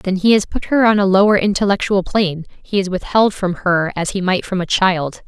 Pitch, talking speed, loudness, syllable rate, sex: 190 Hz, 240 wpm, -16 LUFS, 5.4 syllables/s, female